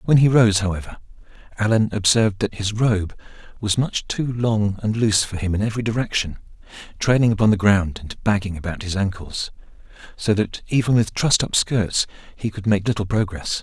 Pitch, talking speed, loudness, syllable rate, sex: 105 Hz, 180 wpm, -21 LUFS, 5.6 syllables/s, male